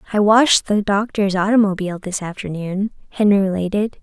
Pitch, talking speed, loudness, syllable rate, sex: 200 Hz, 135 wpm, -18 LUFS, 5.4 syllables/s, female